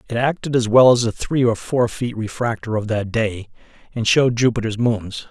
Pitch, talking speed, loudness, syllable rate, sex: 115 Hz, 205 wpm, -19 LUFS, 5.1 syllables/s, male